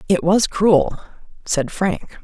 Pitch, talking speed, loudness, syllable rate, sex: 180 Hz, 135 wpm, -18 LUFS, 3.2 syllables/s, female